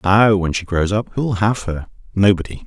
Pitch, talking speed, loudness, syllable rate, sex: 100 Hz, 205 wpm, -18 LUFS, 4.7 syllables/s, male